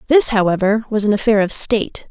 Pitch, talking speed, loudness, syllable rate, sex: 215 Hz, 200 wpm, -15 LUFS, 5.9 syllables/s, female